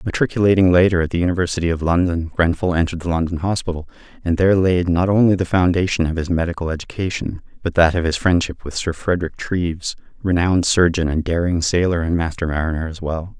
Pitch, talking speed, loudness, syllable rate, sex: 85 Hz, 190 wpm, -19 LUFS, 6.3 syllables/s, male